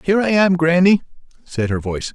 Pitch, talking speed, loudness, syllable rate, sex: 165 Hz, 195 wpm, -17 LUFS, 6.1 syllables/s, male